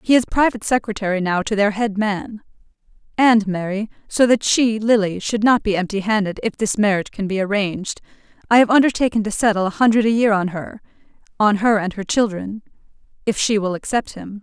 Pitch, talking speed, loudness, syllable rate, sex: 210 Hz, 190 wpm, -18 LUFS, 5.7 syllables/s, female